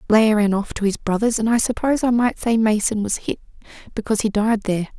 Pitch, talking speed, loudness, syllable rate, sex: 215 Hz, 230 wpm, -19 LUFS, 6.2 syllables/s, female